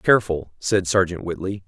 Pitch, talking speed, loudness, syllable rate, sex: 90 Hz, 145 wpm, -22 LUFS, 5.1 syllables/s, male